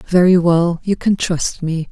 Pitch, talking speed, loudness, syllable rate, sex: 175 Hz, 190 wpm, -16 LUFS, 4.0 syllables/s, female